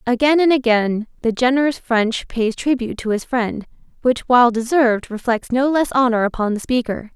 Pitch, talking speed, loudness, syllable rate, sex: 240 Hz, 175 wpm, -18 LUFS, 5.3 syllables/s, female